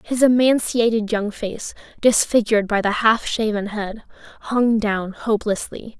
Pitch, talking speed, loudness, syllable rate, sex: 220 Hz, 130 wpm, -19 LUFS, 4.5 syllables/s, female